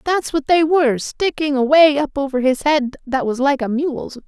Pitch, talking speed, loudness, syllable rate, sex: 285 Hz, 210 wpm, -17 LUFS, 5.0 syllables/s, female